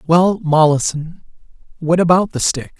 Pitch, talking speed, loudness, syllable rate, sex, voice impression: 165 Hz, 110 wpm, -15 LUFS, 4.4 syllables/s, male, masculine, adult-like, relaxed, weak, dark, soft, muffled, raspy, calm, slightly unique, modest